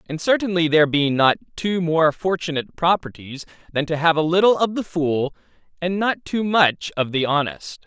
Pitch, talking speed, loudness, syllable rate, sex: 160 Hz, 185 wpm, -20 LUFS, 5.1 syllables/s, male